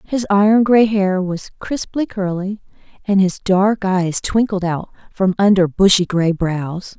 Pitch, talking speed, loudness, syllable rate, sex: 195 Hz, 155 wpm, -17 LUFS, 4.0 syllables/s, female